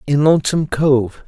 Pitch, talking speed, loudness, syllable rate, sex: 145 Hz, 140 wpm, -15 LUFS, 5.3 syllables/s, male